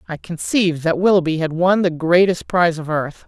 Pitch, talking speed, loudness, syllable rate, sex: 170 Hz, 200 wpm, -17 LUFS, 5.5 syllables/s, female